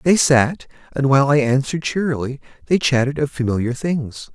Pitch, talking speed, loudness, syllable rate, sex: 140 Hz, 165 wpm, -18 LUFS, 5.4 syllables/s, male